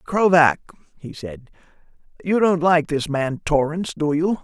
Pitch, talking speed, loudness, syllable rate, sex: 160 Hz, 150 wpm, -19 LUFS, 4.2 syllables/s, male